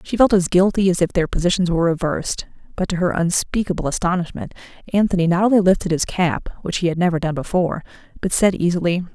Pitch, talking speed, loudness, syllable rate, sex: 180 Hz, 195 wpm, -19 LUFS, 6.5 syllables/s, female